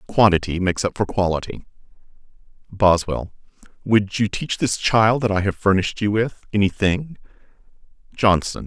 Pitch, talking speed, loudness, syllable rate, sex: 105 Hz, 140 wpm, -20 LUFS, 5.1 syllables/s, male